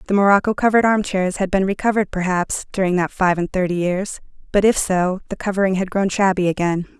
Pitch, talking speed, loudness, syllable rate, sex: 190 Hz, 205 wpm, -19 LUFS, 6.1 syllables/s, female